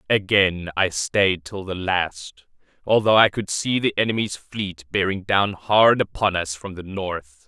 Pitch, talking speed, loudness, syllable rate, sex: 95 Hz, 170 wpm, -21 LUFS, 4.0 syllables/s, male